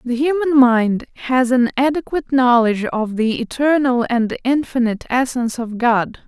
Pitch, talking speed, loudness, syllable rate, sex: 250 Hz, 145 wpm, -17 LUFS, 4.9 syllables/s, female